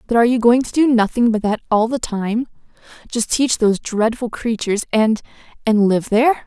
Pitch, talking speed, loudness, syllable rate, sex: 230 Hz, 175 wpm, -17 LUFS, 5.5 syllables/s, female